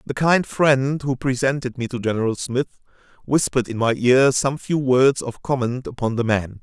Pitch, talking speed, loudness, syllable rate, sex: 130 Hz, 190 wpm, -20 LUFS, 4.9 syllables/s, male